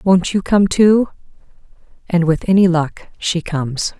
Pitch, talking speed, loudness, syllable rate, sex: 180 Hz, 150 wpm, -16 LUFS, 4.2 syllables/s, female